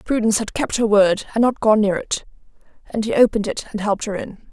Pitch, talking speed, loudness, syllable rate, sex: 220 Hz, 240 wpm, -19 LUFS, 6.3 syllables/s, female